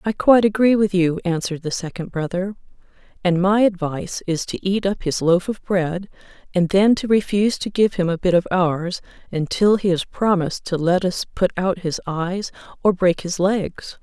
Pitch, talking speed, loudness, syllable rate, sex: 185 Hz, 195 wpm, -20 LUFS, 5.0 syllables/s, female